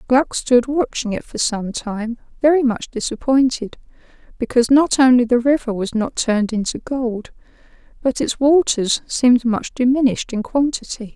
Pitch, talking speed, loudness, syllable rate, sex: 245 Hz, 150 wpm, -18 LUFS, 4.9 syllables/s, female